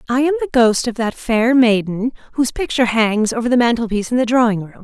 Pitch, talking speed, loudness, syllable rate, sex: 235 Hz, 225 wpm, -16 LUFS, 6.3 syllables/s, female